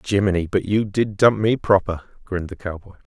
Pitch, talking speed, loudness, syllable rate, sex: 100 Hz, 190 wpm, -20 LUFS, 5.5 syllables/s, male